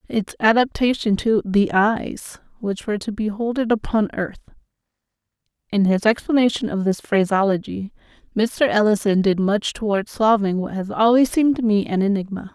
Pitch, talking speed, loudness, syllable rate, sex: 210 Hz, 155 wpm, -20 LUFS, 5.0 syllables/s, female